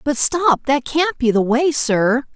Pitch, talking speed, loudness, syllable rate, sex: 265 Hz, 205 wpm, -17 LUFS, 3.8 syllables/s, female